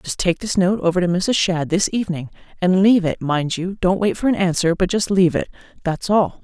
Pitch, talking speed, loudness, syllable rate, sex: 185 Hz, 235 wpm, -19 LUFS, 5.7 syllables/s, female